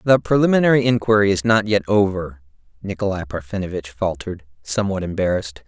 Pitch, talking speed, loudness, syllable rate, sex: 100 Hz, 125 wpm, -19 LUFS, 6.4 syllables/s, male